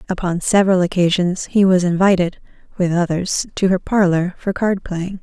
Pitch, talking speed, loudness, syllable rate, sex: 180 Hz, 160 wpm, -17 LUFS, 5.0 syllables/s, female